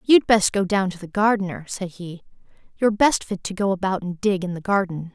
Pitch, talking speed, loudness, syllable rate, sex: 190 Hz, 235 wpm, -22 LUFS, 5.6 syllables/s, female